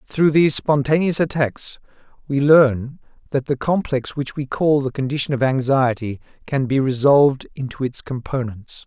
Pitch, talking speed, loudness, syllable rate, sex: 135 Hz, 150 wpm, -19 LUFS, 4.7 syllables/s, male